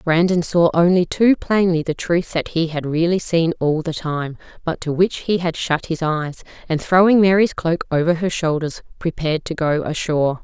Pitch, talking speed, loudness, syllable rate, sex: 165 Hz, 195 wpm, -19 LUFS, 4.9 syllables/s, female